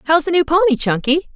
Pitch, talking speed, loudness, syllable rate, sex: 315 Hz, 220 wpm, -16 LUFS, 6.1 syllables/s, female